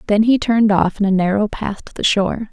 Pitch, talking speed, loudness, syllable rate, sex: 210 Hz, 260 wpm, -17 LUFS, 6.0 syllables/s, female